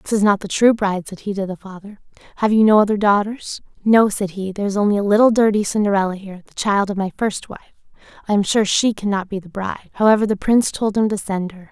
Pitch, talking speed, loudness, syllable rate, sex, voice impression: 205 Hz, 250 wpm, -18 LUFS, 6.5 syllables/s, female, very feminine, slightly young, very thin, tensed, powerful, slightly bright, soft, muffled, fluent, raspy, very cute, slightly cool, intellectual, refreshing, very sincere, calm, very friendly, very reassuring, very unique, very elegant, slightly wild, very sweet, lively, kind, slightly intense, slightly sharp, modest, light